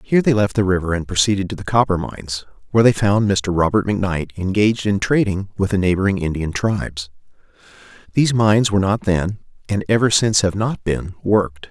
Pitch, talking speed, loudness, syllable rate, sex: 100 Hz, 190 wpm, -18 LUFS, 6.2 syllables/s, male